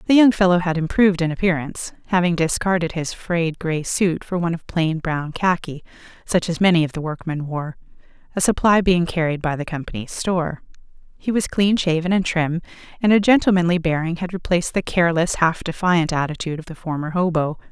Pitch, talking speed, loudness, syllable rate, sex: 170 Hz, 185 wpm, -20 LUFS, 5.7 syllables/s, female